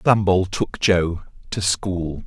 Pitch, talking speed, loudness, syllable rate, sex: 95 Hz, 130 wpm, -21 LUFS, 3.7 syllables/s, male